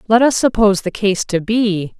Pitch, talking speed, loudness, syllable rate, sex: 205 Hz, 210 wpm, -15 LUFS, 5.0 syllables/s, female